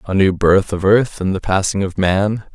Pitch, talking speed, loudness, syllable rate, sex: 95 Hz, 235 wpm, -16 LUFS, 4.8 syllables/s, male